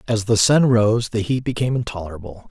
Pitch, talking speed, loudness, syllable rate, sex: 110 Hz, 190 wpm, -18 LUFS, 6.0 syllables/s, male